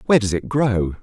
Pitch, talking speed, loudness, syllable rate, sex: 110 Hz, 235 wpm, -19 LUFS, 5.8 syllables/s, male